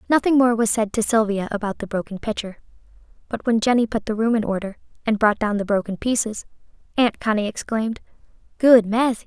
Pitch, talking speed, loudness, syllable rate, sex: 220 Hz, 190 wpm, -21 LUFS, 6.0 syllables/s, female